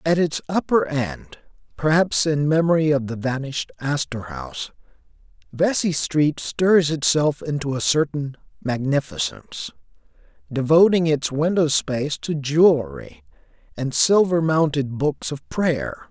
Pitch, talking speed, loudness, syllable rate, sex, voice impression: 150 Hz, 120 wpm, -21 LUFS, 4.4 syllables/s, male, masculine, middle-aged, slightly weak, slightly muffled, sincere, calm, mature, reassuring, slightly wild, kind, slightly modest